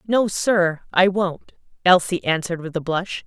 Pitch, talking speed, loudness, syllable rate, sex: 180 Hz, 165 wpm, -20 LUFS, 4.4 syllables/s, female